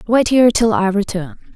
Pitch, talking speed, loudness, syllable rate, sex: 220 Hz, 195 wpm, -15 LUFS, 5.6 syllables/s, female